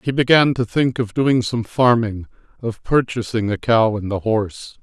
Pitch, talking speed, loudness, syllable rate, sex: 115 Hz, 185 wpm, -18 LUFS, 4.6 syllables/s, male